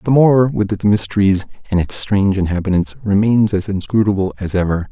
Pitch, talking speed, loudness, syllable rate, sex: 100 Hz, 185 wpm, -16 LUFS, 6.0 syllables/s, male